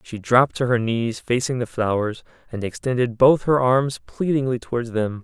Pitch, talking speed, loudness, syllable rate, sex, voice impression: 120 Hz, 185 wpm, -21 LUFS, 5.0 syllables/s, male, very masculine, adult-like, slightly middle-aged, thick, tensed, slightly powerful, bright, soft, very clear, very fluent, very cool, intellectual, very refreshing, sincere, calm, mature, friendly, reassuring, unique, wild, sweet, very lively, kind, slightly light